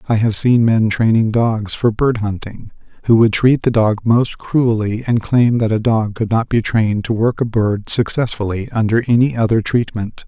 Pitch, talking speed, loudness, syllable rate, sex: 110 Hz, 200 wpm, -16 LUFS, 4.7 syllables/s, male